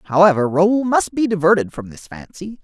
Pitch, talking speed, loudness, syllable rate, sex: 180 Hz, 180 wpm, -16 LUFS, 5.0 syllables/s, male